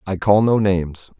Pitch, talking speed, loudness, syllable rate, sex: 95 Hz, 200 wpm, -17 LUFS, 4.9 syllables/s, male